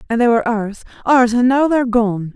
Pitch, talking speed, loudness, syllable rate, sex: 235 Hz, 255 wpm, -15 LUFS, 6.3 syllables/s, female